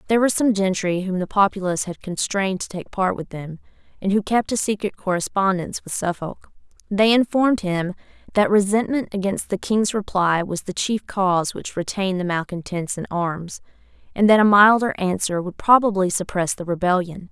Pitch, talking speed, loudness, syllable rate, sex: 195 Hz, 175 wpm, -21 LUFS, 5.5 syllables/s, female